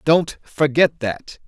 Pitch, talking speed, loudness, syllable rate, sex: 150 Hz, 120 wpm, -19 LUFS, 3.1 syllables/s, male